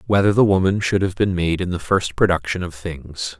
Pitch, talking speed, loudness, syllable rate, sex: 90 Hz, 230 wpm, -19 LUFS, 5.3 syllables/s, male